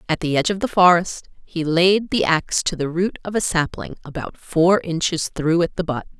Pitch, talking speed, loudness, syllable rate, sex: 170 Hz, 225 wpm, -19 LUFS, 5.1 syllables/s, female